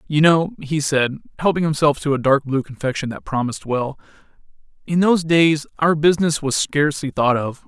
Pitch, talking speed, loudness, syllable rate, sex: 150 Hz, 180 wpm, -19 LUFS, 5.6 syllables/s, male